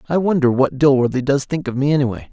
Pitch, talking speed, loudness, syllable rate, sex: 140 Hz, 235 wpm, -17 LUFS, 6.6 syllables/s, male